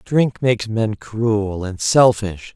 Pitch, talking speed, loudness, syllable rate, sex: 110 Hz, 140 wpm, -18 LUFS, 3.3 syllables/s, male